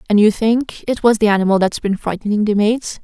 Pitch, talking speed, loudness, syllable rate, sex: 215 Hz, 235 wpm, -16 LUFS, 5.6 syllables/s, female